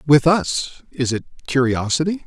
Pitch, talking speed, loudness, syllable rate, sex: 140 Hz, 130 wpm, -19 LUFS, 4.7 syllables/s, male